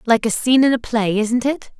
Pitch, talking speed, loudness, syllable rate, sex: 235 Hz, 270 wpm, -17 LUFS, 5.5 syllables/s, female